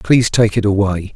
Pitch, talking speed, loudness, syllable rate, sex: 105 Hz, 210 wpm, -15 LUFS, 5.7 syllables/s, male